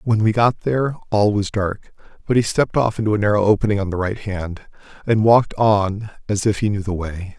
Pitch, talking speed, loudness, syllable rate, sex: 105 Hz, 225 wpm, -19 LUFS, 5.6 syllables/s, male